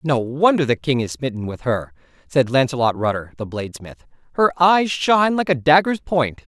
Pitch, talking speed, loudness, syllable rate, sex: 140 Hz, 185 wpm, -19 LUFS, 5.3 syllables/s, male